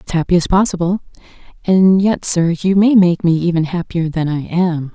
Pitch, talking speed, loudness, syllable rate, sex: 175 Hz, 195 wpm, -15 LUFS, 5.0 syllables/s, female